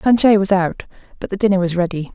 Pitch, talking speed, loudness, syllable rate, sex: 190 Hz, 225 wpm, -17 LUFS, 6.1 syllables/s, female